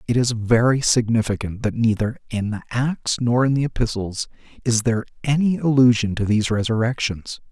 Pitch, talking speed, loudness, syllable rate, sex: 115 Hz, 160 wpm, -20 LUFS, 5.4 syllables/s, male